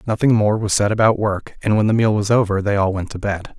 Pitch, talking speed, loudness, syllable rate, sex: 105 Hz, 285 wpm, -18 LUFS, 5.9 syllables/s, male